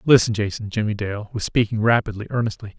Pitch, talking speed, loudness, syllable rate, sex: 110 Hz, 175 wpm, -22 LUFS, 6.2 syllables/s, male